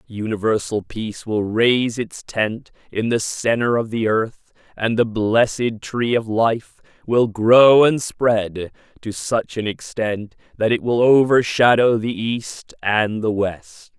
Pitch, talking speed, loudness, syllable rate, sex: 110 Hz, 150 wpm, -19 LUFS, 3.8 syllables/s, male